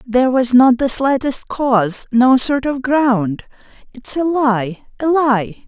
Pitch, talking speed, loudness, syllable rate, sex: 255 Hz, 160 wpm, -15 LUFS, 3.7 syllables/s, female